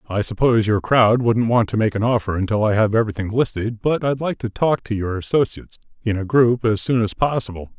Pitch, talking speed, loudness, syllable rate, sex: 110 Hz, 230 wpm, -19 LUFS, 5.9 syllables/s, male